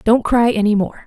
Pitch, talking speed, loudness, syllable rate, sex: 225 Hz, 225 wpm, -16 LUFS, 5.2 syllables/s, female